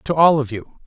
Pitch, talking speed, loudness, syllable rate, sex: 140 Hz, 275 wpm, -17 LUFS, 5.0 syllables/s, male